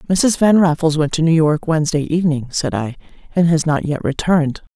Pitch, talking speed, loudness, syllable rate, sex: 160 Hz, 200 wpm, -16 LUFS, 5.6 syllables/s, female